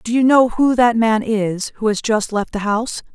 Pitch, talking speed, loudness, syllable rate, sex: 225 Hz, 250 wpm, -17 LUFS, 4.8 syllables/s, female